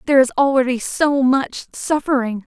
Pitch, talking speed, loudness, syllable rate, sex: 265 Hz, 120 wpm, -18 LUFS, 4.9 syllables/s, female